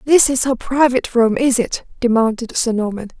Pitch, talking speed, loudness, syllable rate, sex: 245 Hz, 190 wpm, -16 LUFS, 5.3 syllables/s, female